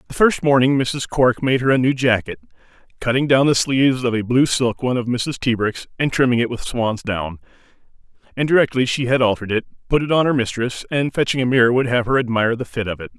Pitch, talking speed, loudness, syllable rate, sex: 125 Hz, 230 wpm, -18 LUFS, 6.2 syllables/s, male